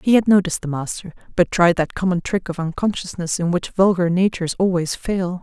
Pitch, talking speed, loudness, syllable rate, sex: 180 Hz, 200 wpm, -20 LUFS, 5.7 syllables/s, female